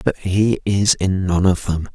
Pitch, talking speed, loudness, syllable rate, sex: 95 Hz, 215 wpm, -18 LUFS, 3.9 syllables/s, male